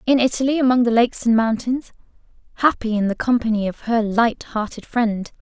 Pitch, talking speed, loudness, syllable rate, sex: 230 Hz, 175 wpm, -19 LUFS, 5.6 syllables/s, female